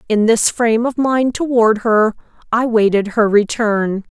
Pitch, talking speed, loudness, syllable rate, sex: 225 Hz, 160 wpm, -15 LUFS, 4.2 syllables/s, female